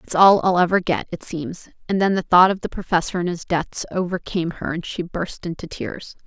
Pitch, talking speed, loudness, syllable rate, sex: 175 Hz, 230 wpm, -21 LUFS, 5.4 syllables/s, female